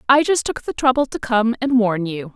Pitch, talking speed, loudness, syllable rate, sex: 235 Hz, 255 wpm, -19 LUFS, 5.2 syllables/s, female